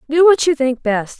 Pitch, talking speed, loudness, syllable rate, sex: 290 Hz, 250 wpm, -15 LUFS, 5.0 syllables/s, female